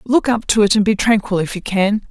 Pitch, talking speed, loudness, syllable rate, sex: 210 Hz, 285 wpm, -16 LUFS, 5.5 syllables/s, female